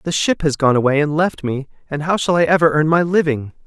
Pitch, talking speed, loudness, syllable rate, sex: 155 Hz, 260 wpm, -17 LUFS, 5.9 syllables/s, male